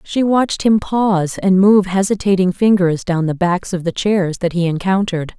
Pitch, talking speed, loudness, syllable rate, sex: 190 Hz, 190 wpm, -16 LUFS, 4.9 syllables/s, female